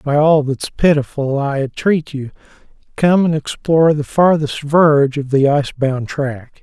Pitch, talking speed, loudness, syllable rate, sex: 145 Hz, 165 wpm, -15 LUFS, 4.5 syllables/s, male